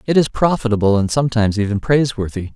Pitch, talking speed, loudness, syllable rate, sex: 115 Hz, 165 wpm, -17 LUFS, 7.0 syllables/s, male